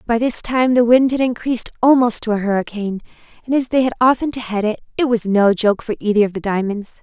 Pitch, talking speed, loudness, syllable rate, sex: 230 Hz, 240 wpm, -17 LUFS, 6.2 syllables/s, female